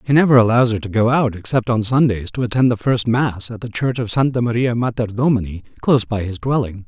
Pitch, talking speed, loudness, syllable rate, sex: 115 Hz, 235 wpm, -18 LUFS, 6.0 syllables/s, male